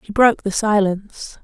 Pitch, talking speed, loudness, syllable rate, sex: 205 Hz, 165 wpm, -18 LUFS, 5.3 syllables/s, female